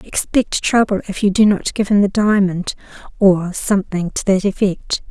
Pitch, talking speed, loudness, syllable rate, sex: 195 Hz, 175 wpm, -16 LUFS, 4.7 syllables/s, female